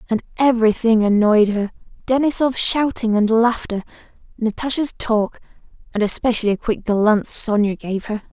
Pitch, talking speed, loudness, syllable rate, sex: 225 Hz, 120 wpm, -18 LUFS, 5.1 syllables/s, female